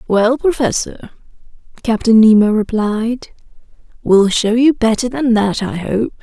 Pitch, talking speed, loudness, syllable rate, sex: 225 Hz, 125 wpm, -14 LUFS, 4.1 syllables/s, female